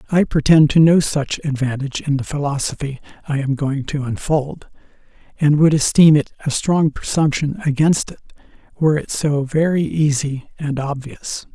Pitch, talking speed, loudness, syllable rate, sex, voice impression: 145 Hz, 155 wpm, -18 LUFS, 4.9 syllables/s, male, masculine, adult-like, relaxed, weak, slightly dark, soft, muffled, raspy, intellectual, calm, reassuring, slightly wild, kind, modest